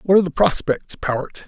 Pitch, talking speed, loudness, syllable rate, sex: 165 Hz, 205 wpm, -20 LUFS, 5.8 syllables/s, male